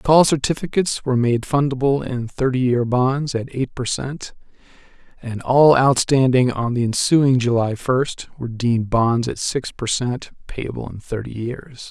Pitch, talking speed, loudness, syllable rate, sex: 125 Hz, 160 wpm, -19 LUFS, 4.5 syllables/s, male